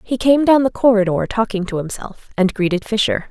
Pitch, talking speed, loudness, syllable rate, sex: 215 Hz, 200 wpm, -17 LUFS, 5.5 syllables/s, female